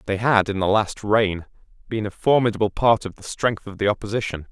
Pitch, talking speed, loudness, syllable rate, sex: 105 Hz, 215 wpm, -21 LUFS, 5.6 syllables/s, male